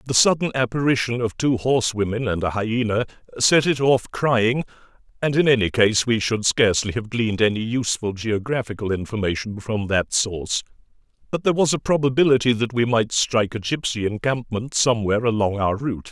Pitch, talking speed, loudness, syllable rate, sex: 115 Hz, 170 wpm, -21 LUFS, 5.7 syllables/s, male